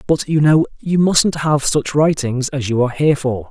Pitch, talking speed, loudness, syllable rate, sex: 145 Hz, 225 wpm, -16 LUFS, 4.9 syllables/s, male